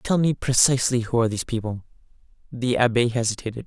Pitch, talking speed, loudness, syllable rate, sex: 120 Hz, 165 wpm, -22 LUFS, 6.7 syllables/s, male